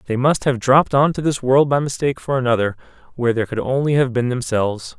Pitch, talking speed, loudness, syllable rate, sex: 125 Hz, 230 wpm, -18 LUFS, 6.6 syllables/s, male